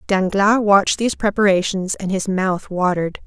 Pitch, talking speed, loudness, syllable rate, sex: 195 Hz, 145 wpm, -18 LUFS, 5.1 syllables/s, female